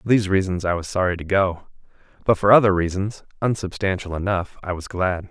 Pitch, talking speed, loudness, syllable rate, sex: 95 Hz, 190 wpm, -21 LUFS, 5.8 syllables/s, male